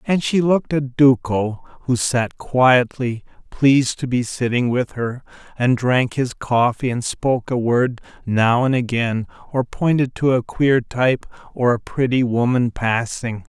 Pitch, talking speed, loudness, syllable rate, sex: 125 Hz, 160 wpm, -19 LUFS, 4.2 syllables/s, male